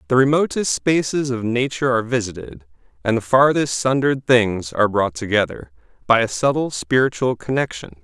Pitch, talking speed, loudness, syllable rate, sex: 120 Hz, 150 wpm, -19 LUFS, 5.5 syllables/s, male